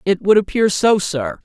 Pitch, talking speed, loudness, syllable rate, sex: 185 Hz, 210 wpm, -16 LUFS, 4.7 syllables/s, male